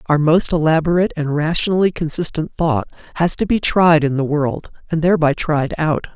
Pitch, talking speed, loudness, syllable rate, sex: 160 Hz, 175 wpm, -17 LUFS, 5.3 syllables/s, male